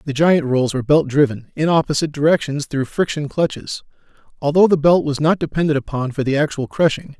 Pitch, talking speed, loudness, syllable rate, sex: 150 Hz, 190 wpm, -18 LUFS, 5.9 syllables/s, male